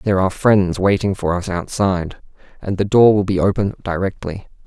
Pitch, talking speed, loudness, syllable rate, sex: 95 Hz, 180 wpm, -17 LUFS, 5.5 syllables/s, male